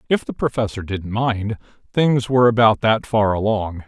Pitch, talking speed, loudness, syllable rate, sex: 110 Hz, 170 wpm, -19 LUFS, 4.8 syllables/s, male